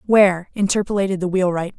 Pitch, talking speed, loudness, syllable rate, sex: 190 Hz, 135 wpm, -19 LUFS, 6.3 syllables/s, female